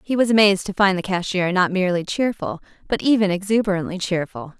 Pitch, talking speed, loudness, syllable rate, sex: 190 Hz, 185 wpm, -20 LUFS, 6.2 syllables/s, female